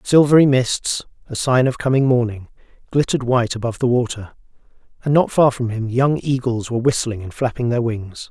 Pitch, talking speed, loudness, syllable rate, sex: 125 Hz, 180 wpm, -18 LUFS, 5.7 syllables/s, male